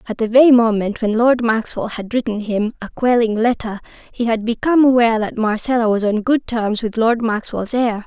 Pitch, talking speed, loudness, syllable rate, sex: 230 Hz, 200 wpm, -17 LUFS, 5.4 syllables/s, female